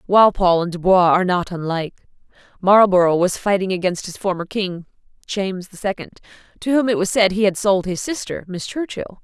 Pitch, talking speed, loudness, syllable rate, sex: 190 Hz, 180 wpm, -19 LUFS, 5.7 syllables/s, female